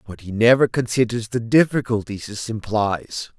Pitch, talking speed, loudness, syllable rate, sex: 115 Hz, 140 wpm, -20 LUFS, 4.7 syllables/s, male